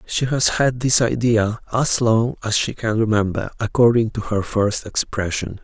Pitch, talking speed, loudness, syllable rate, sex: 110 Hz, 170 wpm, -19 LUFS, 4.4 syllables/s, male